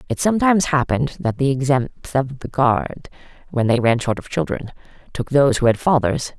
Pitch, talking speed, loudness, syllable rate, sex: 135 Hz, 190 wpm, -19 LUFS, 5.4 syllables/s, female